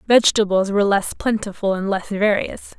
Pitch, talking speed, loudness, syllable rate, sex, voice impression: 205 Hz, 150 wpm, -19 LUFS, 5.3 syllables/s, female, very feminine, slightly young, thin, tensed, slightly weak, very bright, hard, very clear, fluent, slightly raspy, very cute, slightly cool, intellectual, refreshing, very sincere, calm, very mature, very friendly, very reassuring, very unique, elegant, slightly wild, very sweet, very lively, kind, slightly sharp